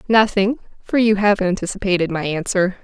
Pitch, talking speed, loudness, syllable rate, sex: 195 Hz, 150 wpm, -18 LUFS, 5.4 syllables/s, female